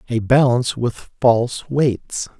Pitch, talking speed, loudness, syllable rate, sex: 120 Hz, 125 wpm, -18 LUFS, 3.9 syllables/s, male